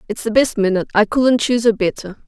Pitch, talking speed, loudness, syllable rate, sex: 220 Hz, 235 wpm, -16 LUFS, 6.6 syllables/s, female